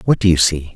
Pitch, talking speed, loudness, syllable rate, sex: 90 Hz, 315 wpm, -15 LUFS, 6.4 syllables/s, male